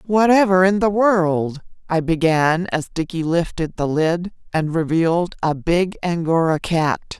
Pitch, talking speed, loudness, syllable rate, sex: 170 Hz, 140 wpm, -19 LUFS, 4.1 syllables/s, female